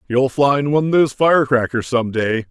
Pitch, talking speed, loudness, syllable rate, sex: 130 Hz, 190 wpm, -16 LUFS, 5.7 syllables/s, male